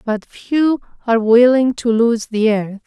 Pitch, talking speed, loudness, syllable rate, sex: 235 Hz, 165 wpm, -15 LUFS, 4.0 syllables/s, female